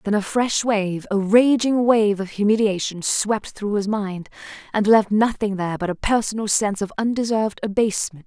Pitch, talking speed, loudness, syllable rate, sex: 210 Hz, 175 wpm, -20 LUFS, 5.1 syllables/s, female